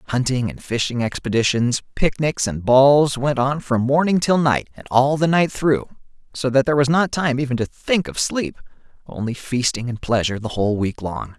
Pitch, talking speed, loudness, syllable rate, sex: 130 Hz, 195 wpm, -19 LUFS, 5.1 syllables/s, male